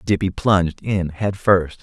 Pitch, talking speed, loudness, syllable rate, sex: 95 Hz, 165 wpm, -19 LUFS, 4.1 syllables/s, male